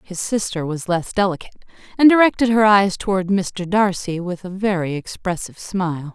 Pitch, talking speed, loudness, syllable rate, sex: 190 Hz, 165 wpm, -19 LUFS, 5.4 syllables/s, female